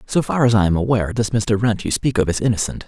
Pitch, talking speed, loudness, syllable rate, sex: 110 Hz, 295 wpm, -18 LUFS, 6.7 syllables/s, male